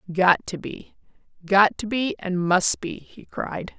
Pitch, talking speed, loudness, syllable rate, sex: 190 Hz, 160 wpm, -22 LUFS, 3.8 syllables/s, female